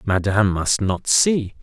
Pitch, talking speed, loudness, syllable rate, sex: 110 Hz, 150 wpm, -18 LUFS, 4.0 syllables/s, male